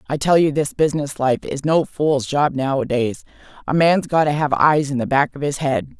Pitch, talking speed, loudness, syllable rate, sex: 145 Hz, 220 wpm, -19 LUFS, 5.0 syllables/s, female